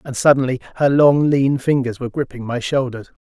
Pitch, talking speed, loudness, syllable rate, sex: 130 Hz, 185 wpm, -17 LUFS, 5.6 syllables/s, male